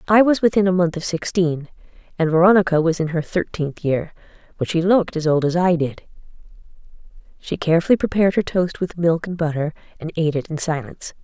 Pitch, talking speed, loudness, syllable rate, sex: 170 Hz, 190 wpm, -19 LUFS, 6.1 syllables/s, female